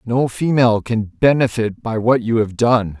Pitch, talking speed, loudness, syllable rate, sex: 115 Hz, 180 wpm, -17 LUFS, 4.5 syllables/s, male